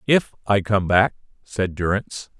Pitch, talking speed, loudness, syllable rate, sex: 105 Hz, 150 wpm, -21 LUFS, 4.5 syllables/s, male